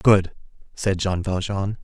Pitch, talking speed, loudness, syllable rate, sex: 95 Hz, 130 wpm, -23 LUFS, 3.6 syllables/s, male